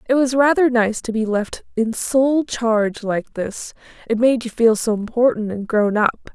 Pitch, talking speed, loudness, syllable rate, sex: 230 Hz, 190 wpm, -19 LUFS, 4.5 syllables/s, female